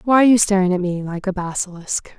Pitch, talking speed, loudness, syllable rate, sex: 195 Hz, 245 wpm, -18 LUFS, 6.4 syllables/s, female